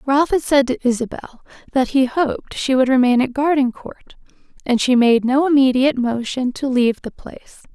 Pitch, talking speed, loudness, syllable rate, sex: 260 Hz, 180 wpm, -17 LUFS, 5.2 syllables/s, female